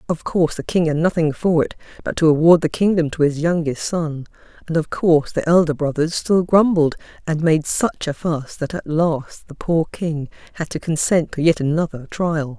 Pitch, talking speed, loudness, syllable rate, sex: 160 Hz, 205 wpm, -19 LUFS, 5.0 syllables/s, female